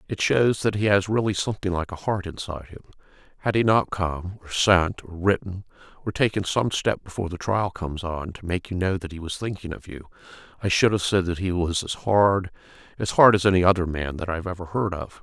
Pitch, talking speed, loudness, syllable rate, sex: 95 Hz, 230 wpm, -24 LUFS, 5.7 syllables/s, male